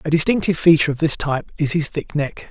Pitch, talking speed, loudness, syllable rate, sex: 155 Hz, 240 wpm, -18 LUFS, 6.8 syllables/s, male